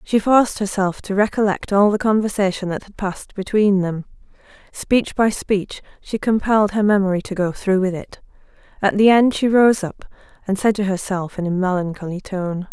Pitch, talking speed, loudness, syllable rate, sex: 200 Hz, 185 wpm, -19 LUFS, 5.2 syllables/s, female